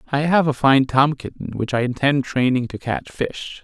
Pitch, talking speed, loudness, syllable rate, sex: 135 Hz, 215 wpm, -20 LUFS, 4.7 syllables/s, male